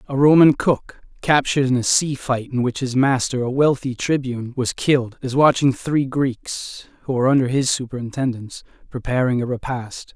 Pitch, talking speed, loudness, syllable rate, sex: 130 Hz, 170 wpm, -19 LUFS, 5.2 syllables/s, male